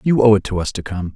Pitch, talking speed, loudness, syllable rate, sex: 105 Hz, 365 wpm, -17 LUFS, 6.7 syllables/s, male